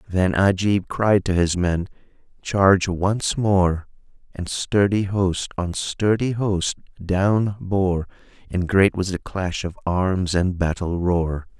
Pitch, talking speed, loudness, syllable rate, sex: 95 Hz, 140 wpm, -21 LUFS, 3.4 syllables/s, male